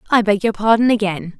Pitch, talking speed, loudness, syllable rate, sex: 210 Hz, 215 wpm, -16 LUFS, 6.1 syllables/s, female